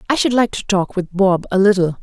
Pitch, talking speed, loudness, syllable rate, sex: 195 Hz, 265 wpm, -16 LUFS, 5.7 syllables/s, female